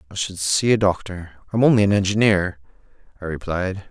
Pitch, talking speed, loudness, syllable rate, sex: 95 Hz, 170 wpm, -20 LUFS, 5.5 syllables/s, male